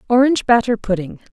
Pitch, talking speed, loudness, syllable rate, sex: 230 Hz, 135 wpm, -17 LUFS, 6.7 syllables/s, female